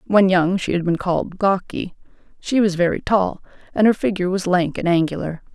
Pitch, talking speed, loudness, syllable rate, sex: 185 Hz, 195 wpm, -19 LUFS, 5.5 syllables/s, female